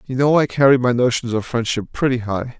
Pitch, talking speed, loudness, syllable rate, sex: 125 Hz, 230 wpm, -18 LUFS, 5.9 syllables/s, male